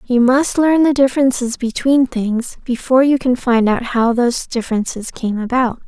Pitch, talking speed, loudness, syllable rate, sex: 245 Hz, 175 wpm, -16 LUFS, 5.0 syllables/s, female